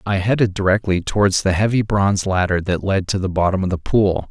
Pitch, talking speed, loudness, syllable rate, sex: 95 Hz, 225 wpm, -18 LUFS, 5.7 syllables/s, male